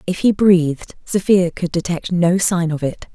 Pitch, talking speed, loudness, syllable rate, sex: 175 Hz, 190 wpm, -17 LUFS, 4.5 syllables/s, female